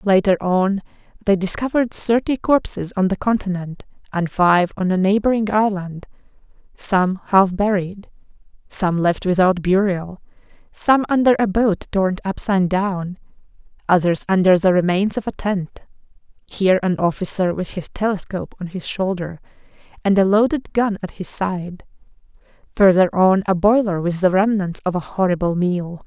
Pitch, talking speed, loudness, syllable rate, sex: 190 Hz, 145 wpm, -19 LUFS, 4.8 syllables/s, female